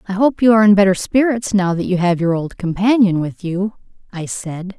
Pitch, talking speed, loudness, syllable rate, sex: 195 Hz, 225 wpm, -16 LUFS, 5.4 syllables/s, female